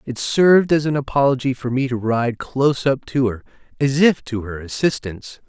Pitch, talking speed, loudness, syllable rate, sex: 130 Hz, 195 wpm, -19 LUFS, 5.2 syllables/s, male